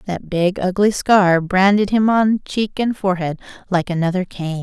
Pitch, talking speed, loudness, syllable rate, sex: 190 Hz, 170 wpm, -17 LUFS, 4.6 syllables/s, female